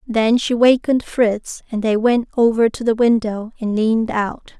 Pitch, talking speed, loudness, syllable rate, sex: 225 Hz, 185 wpm, -17 LUFS, 4.5 syllables/s, female